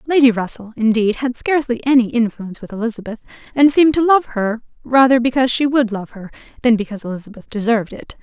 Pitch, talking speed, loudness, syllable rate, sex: 240 Hz, 180 wpm, -16 LUFS, 6.6 syllables/s, female